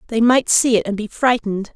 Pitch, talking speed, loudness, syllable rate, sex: 230 Hz, 240 wpm, -17 LUFS, 5.9 syllables/s, female